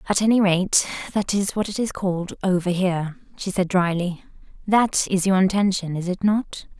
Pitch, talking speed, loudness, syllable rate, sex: 190 Hz, 185 wpm, -22 LUFS, 5.1 syllables/s, female